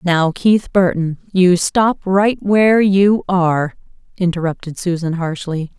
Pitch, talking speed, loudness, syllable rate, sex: 180 Hz, 125 wpm, -16 LUFS, 4.0 syllables/s, female